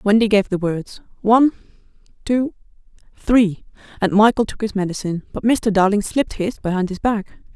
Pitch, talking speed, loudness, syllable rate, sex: 210 Hz, 160 wpm, -19 LUFS, 5.4 syllables/s, female